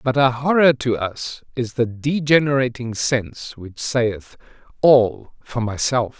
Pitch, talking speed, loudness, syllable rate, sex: 125 Hz, 135 wpm, -19 LUFS, 3.8 syllables/s, male